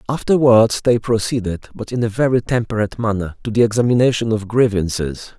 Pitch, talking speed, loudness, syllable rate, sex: 110 Hz, 155 wpm, -17 LUFS, 5.9 syllables/s, male